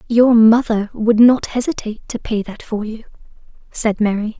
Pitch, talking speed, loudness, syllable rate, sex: 220 Hz, 165 wpm, -16 LUFS, 4.8 syllables/s, female